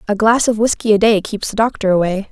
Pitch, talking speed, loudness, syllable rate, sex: 210 Hz, 260 wpm, -15 LUFS, 6.1 syllables/s, female